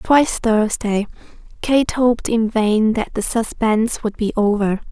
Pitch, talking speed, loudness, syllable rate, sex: 220 Hz, 145 wpm, -18 LUFS, 4.3 syllables/s, female